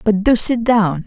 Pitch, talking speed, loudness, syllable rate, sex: 210 Hz, 225 wpm, -14 LUFS, 4.1 syllables/s, female